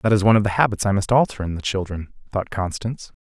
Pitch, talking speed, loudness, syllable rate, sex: 105 Hz, 260 wpm, -21 LUFS, 6.8 syllables/s, male